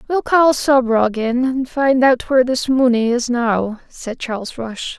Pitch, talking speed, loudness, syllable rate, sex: 250 Hz, 180 wpm, -17 LUFS, 4.0 syllables/s, female